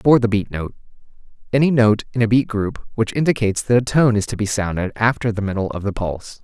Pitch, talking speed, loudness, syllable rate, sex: 110 Hz, 235 wpm, -19 LUFS, 6.4 syllables/s, male